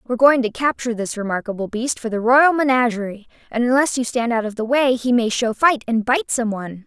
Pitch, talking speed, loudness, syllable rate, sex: 240 Hz, 235 wpm, -19 LUFS, 5.9 syllables/s, female